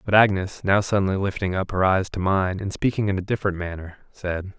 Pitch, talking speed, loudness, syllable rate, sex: 95 Hz, 220 wpm, -23 LUFS, 5.9 syllables/s, male